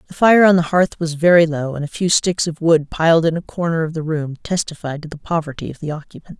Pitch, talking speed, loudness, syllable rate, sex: 165 Hz, 265 wpm, -17 LUFS, 5.9 syllables/s, female